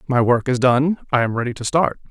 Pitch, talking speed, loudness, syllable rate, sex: 130 Hz, 255 wpm, -18 LUFS, 5.7 syllables/s, male